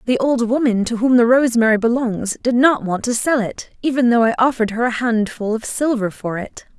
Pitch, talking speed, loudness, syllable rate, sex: 235 Hz, 220 wpm, -17 LUFS, 5.5 syllables/s, female